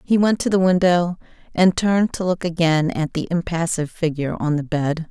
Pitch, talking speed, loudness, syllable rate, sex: 170 Hz, 200 wpm, -20 LUFS, 5.4 syllables/s, female